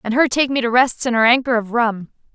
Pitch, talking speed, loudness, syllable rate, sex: 240 Hz, 280 wpm, -17 LUFS, 5.9 syllables/s, female